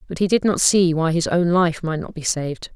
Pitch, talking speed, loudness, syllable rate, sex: 170 Hz, 285 wpm, -19 LUFS, 5.4 syllables/s, female